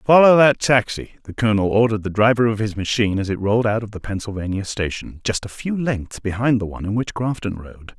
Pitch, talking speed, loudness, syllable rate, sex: 110 Hz, 225 wpm, -20 LUFS, 6.0 syllables/s, male